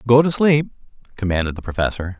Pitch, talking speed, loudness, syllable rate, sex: 115 Hz, 165 wpm, -19 LUFS, 6.5 syllables/s, male